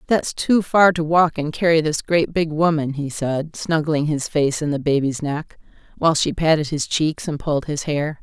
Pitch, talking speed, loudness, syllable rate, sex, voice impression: 155 Hz, 210 wpm, -20 LUFS, 4.7 syllables/s, female, very feminine, very adult-like, middle-aged, slightly thin, slightly tensed, slightly powerful, slightly bright, soft, clear, fluent, cool, intellectual, refreshing, very sincere, very calm, friendly, reassuring, very unique, elegant, slightly wild, sweet, slightly lively, kind, slightly modest